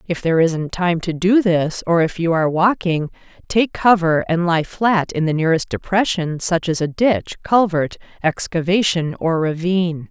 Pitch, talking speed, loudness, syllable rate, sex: 175 Hz, 160 wpm, -18 LUFS, 4.7 syllables/s, female